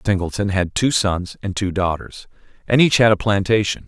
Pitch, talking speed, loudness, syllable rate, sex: 100 Hz, 200 wpm, -18 LUFS, 5.5 syllables/s, male